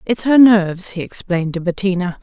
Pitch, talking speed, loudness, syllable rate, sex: 190 Hz, 190 wpm, -15 LUFS, 5.7 syllables/s, female